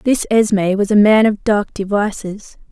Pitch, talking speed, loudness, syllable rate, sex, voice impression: 205 Hz, 175 wpm, -15 LUFS, 4.8 syllables/s, female, feminine, young, slightly adult-like, thin, tensed, slightly weak, slightly bright, very hard, very clear, slightly fluent, cute, slightly intellectual, refreshing, slightly sincere, calm, slightly friendly, slightly reassuring, slightly elegant, slightly strict, slightly modest